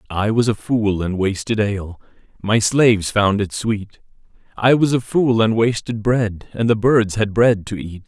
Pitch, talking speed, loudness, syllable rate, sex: 110 Hz, 195 wpm, -18 LUFS, 4.4 syllables/s, male